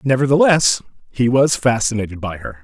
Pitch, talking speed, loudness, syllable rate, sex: 125 Hz, 135 wpm, -16 LUFS, 5.5 syllables/s, male